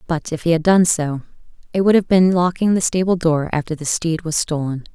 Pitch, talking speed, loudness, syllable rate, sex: 165 Hz, 230 wpm, -18 LUFS, 5.5 syllables/s, female